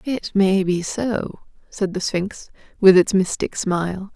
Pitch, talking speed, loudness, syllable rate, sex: 190 Hz, 160 wpm, -20 LUFS, 3.8 syllables/s, female